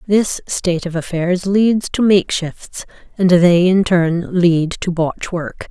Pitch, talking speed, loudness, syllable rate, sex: 180 Hz, 160 wpm, -16 LUFS, 3.7 syllables/s, female